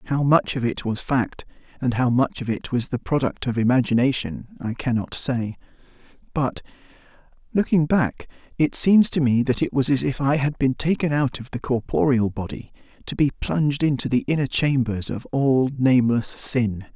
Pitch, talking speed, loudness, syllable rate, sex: 130 Hz, 180 wpm, -22 LUFS, 5.0 syllables/s, male